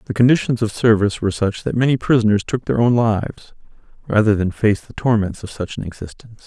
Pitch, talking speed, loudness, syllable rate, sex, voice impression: 110 Hz, 205 wpm, -18 LUFS, 6.3 syllables/s, male, very masculine, very middle-aged, very thick, relaxed, weak, dark, very soft, slightly muffled, fluent, very cool, very intellectual, sincere, very calm, very mature, very friendly, very reassuring, unique, elegant, wild, sweet, slightly lively, kind, modest